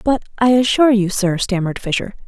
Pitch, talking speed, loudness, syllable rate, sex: 215 Hz, 185 wpm, -16 LUFS, 6.3 syllables/s, female